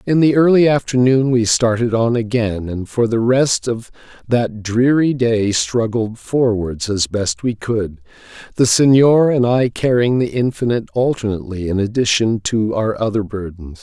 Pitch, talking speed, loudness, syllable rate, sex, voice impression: 115 Hz, 155 wpm, -16 LUFS, 4.3 syllables/s, male, very masculine, very adult-like, slightly thick, slightly sincere, slightly unique